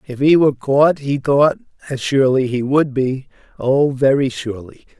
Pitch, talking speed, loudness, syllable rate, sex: 135 Hz, 155 wpm, -16 LUFS, 4.8 syllables/s, male